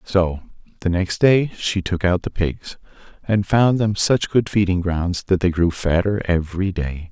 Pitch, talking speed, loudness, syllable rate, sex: 95 Hz, 185 wpm, -20 LUFS, 4.3 syllables/s, male